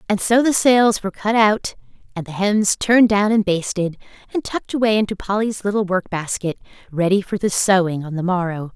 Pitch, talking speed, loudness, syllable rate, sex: 200 Hz, 200 wpm, -18 LUFS, 5.5 syllables/s, female